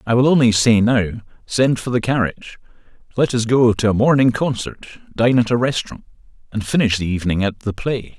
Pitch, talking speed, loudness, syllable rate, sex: 115 Hz, 200 wpm, -17 LUFS, 5.8 syllables/s, male